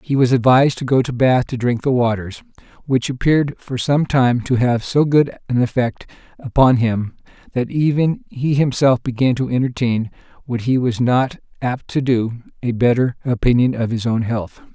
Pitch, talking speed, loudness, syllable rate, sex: 125 Hz, 185 wpm, -18 LUFS, 4.8 syllables/s, male